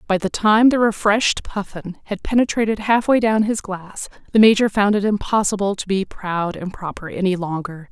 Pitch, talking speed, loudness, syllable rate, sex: 200 Hz, 180 wpm, -19 LUFS, 5.2 syllables/s, female